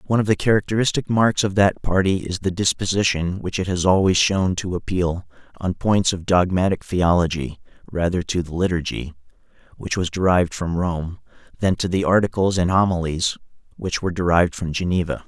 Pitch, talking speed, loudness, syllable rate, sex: 90 Hz, 170 wpm, -20 LUFS, 5.5 syllables/s, male